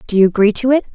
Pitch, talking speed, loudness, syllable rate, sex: 225 Hz, 320 wpm, -14 LUFS, 8.1 syllables/s, female